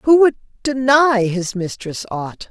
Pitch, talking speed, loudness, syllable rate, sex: 225 Hz, 145 wpm, -17 LUFS, 3.7 syllables/s, female